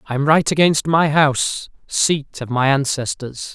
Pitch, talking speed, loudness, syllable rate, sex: 145 Hz, 150 wpm, -17 LUFS, 4.3 syllables/s, male